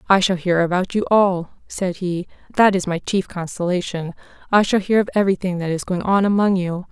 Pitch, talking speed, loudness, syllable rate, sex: 185 Hz, 215 wpm, -19 LUFS, 5.5 syllables/s, female